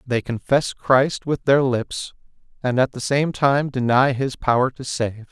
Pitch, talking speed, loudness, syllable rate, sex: 130 Hz, 180 wpm, -20 LUFS, 4.0 syllables/s, male